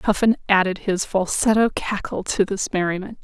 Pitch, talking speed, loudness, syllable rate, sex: 195 Hz, 150 wpm, -21 LUFS, 4.9 syllables/s, female